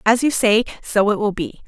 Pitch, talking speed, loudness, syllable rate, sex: 220 Hz, 250 wpm, -18 LUFS, 5.3 syllables/s, female